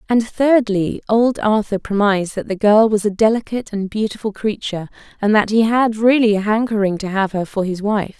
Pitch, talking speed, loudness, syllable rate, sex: 210 Hz, 200 wpm, -17 LUFS, 5.4 syllables/s, female